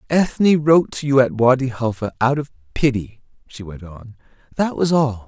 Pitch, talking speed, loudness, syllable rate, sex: 125 Hz, 180 wpm, -18 LUFS, 5.1 syllables/s, male